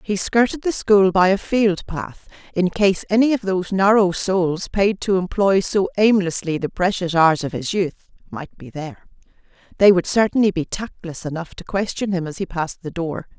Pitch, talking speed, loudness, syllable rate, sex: 185 Hz, 195 wpm, -19 LUFS, 4.9 syllables/s, female